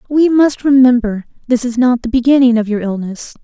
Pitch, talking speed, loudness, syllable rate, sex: 245 Hz, 190 wpm, -13 LUFS, 5.4 syllables/s, female